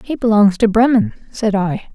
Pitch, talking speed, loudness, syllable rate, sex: 220 Hz, 185 wpm, -15 LUFS, 5.0 syllables/s, female